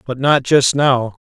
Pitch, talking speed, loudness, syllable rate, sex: 130 Hz, 195 wpm, -14 LUFS, 3.9 syllables/s, male